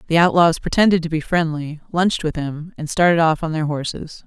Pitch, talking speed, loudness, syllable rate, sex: 160 Hz, 210 wpm, -19 LUFS, 5.6 syllables/s, female